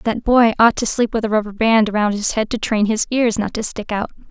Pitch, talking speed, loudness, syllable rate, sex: 220 Hz, 280 wpm, -17 LUFS, 5.5 syllables/s, female